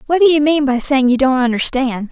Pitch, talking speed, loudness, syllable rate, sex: 270 Hz, 255 wpm, -14 LUFS, 5.6 syllables/s, female